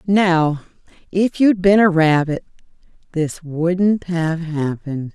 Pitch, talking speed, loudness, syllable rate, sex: 170 Hz, 115 wpm, -18 LUFS, 3.4 syllables/s, female